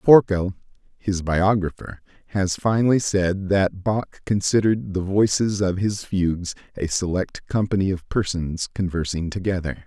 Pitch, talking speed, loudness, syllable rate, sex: 95 Hz, 130 wpm, -22 LUFS, 4.5 syllables/s, male